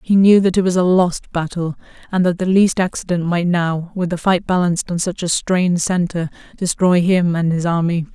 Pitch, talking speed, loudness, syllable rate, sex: 175 Hz, 200 wpm, -17 LUFS, 5.2 syllables/s, female